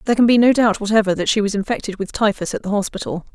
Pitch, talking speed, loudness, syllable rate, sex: 210 Hz, 270 wpm, -18 LUFS, 7.3 syllables/s, female